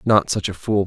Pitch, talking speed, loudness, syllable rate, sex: 100 Hz, 280 wpm, -20 LUFS, 5.3 syllables/s, male